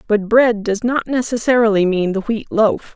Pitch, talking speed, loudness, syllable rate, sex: 220 Hz, 185 wpm, -16 LUFS, 4.8 syllables/s, female